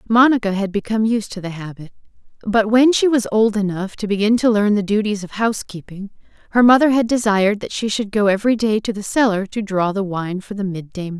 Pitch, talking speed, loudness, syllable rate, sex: 210 Hz, 225 wpm, -18 LUFS, 5.9 syllables/s, female